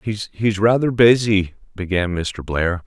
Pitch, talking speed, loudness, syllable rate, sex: 100 Hz, 125 wpm, -18 LUFS, 3.9 syllables/s, male